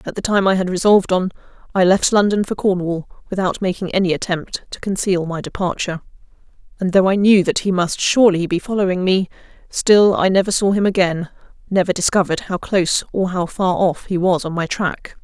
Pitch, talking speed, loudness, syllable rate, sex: 185 Hz, 195 wpm, -17 LUFS, 5.7 syllables/s, female